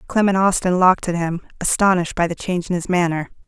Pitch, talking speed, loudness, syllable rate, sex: 180 Hz, 205 wpm, -19 LUFS, 6.7 syllables/s, female